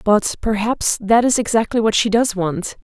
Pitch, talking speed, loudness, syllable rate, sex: 215 Hz, 185 wpm, -17 LUFS, 4.5 syllables/s, female